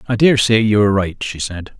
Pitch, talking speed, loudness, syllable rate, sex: 105 Hz, 235 wpm, -15 LUFS, 6.4 syllables/s, male